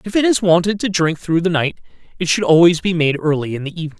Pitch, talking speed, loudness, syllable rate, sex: 170 Hz, 270 wpm, -16 LUFS, 6.5 syllables/s, male